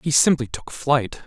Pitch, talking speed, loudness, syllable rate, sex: 130 Hz, 190 wpm, -21 LUFS, 4.1 syllables/s, male